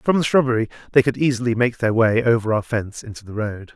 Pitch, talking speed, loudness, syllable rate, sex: 120 Hz, 240 wpm, -19 LUFS, 6.4 syllables/s, male